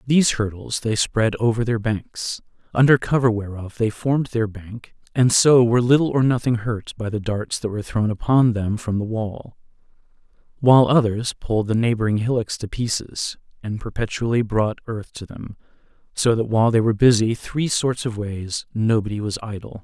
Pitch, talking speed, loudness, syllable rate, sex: 115 Hz, 180 wpm, -21 LUFS, 5.1 syllables/s, male